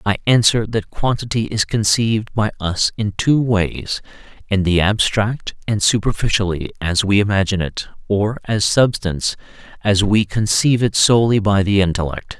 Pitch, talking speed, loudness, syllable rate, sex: 105 Hz, 150 wpm, -17 LUFS, 4.9 syllables/s, male